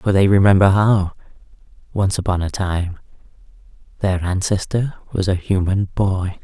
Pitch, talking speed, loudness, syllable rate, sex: 95 Hz, 130 wpm, -18 LUFS, 4.6 syllables/s, male